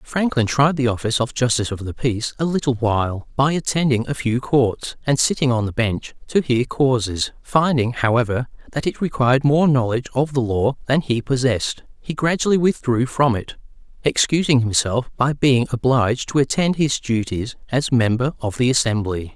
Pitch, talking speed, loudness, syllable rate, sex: 130 Hz, 175 wpm, -19 LUFS, 5.2 syllables/s, male